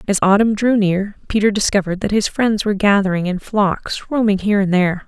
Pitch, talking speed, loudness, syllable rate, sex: 200 Hz, 200 wpm, -17 LUFS, 5.9 syllables/s, female